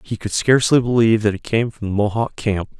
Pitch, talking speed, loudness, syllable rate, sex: 110 Hz, 235 wpm, -18 LUFS, 6.1 syllables/s, male